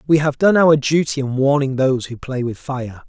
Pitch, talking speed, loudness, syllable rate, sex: 140 Hz, 235 wpm, -17 LUFS, 5.2 syllables/s, male